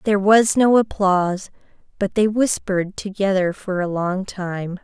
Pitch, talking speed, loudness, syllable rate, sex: 195 Hz, 150 wpm, -19 LUFS, 4.5 syllables/s, female